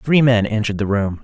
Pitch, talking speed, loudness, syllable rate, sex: 110 Hz, 245 wpm, -17 LUFS, 6.2 syllables/s, male